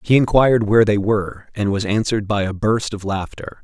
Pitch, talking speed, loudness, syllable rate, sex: 105 Hz, 215 wpm, -18 LUFS, 5.8 syllables/s, male